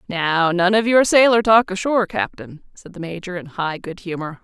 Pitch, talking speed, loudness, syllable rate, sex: 185 Hz, 205 wpm, -18 LUFS, 5.0 syllables/s, female